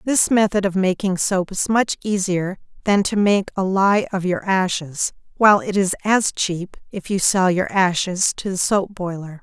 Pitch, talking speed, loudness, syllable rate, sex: 190 Hz, 190 wpm, -19 LUFS, 4.4 syllables/s, female